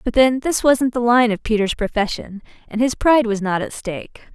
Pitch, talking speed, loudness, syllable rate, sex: 230 Hz, 220 wpm, -18 LUFS, 5.3 syllables/s, female